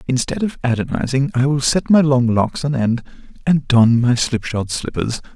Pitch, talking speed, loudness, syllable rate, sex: 130 Hz, 180 wpm, -17 LUFS, 4.8 syllables/s, male